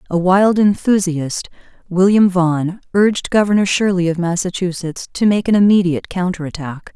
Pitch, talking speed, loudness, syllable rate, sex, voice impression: 185 Hz, 130 wpm, -16 LUFS, 5.2 syllables/s, female, very feminine, adult-like, slightly middle-aged, thin, very tensed, powerful, bright, very hard, very clear, very fluent, very cool, very intellectual, very refreshing, very sincere, very calm, very friendly, very reassuring, slightly unique, elegant, sweet, slightly lively, very kind, slightly sharp, slightly modest